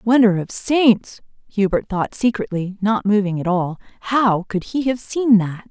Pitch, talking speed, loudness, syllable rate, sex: 210 Hz, 170 wpm, -19 LUFS, 4.2 syllables/s, female